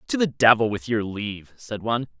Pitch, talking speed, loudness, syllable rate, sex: 110 Hz, 220 wpm, -22 LUFS, 5.7 syllables/s, male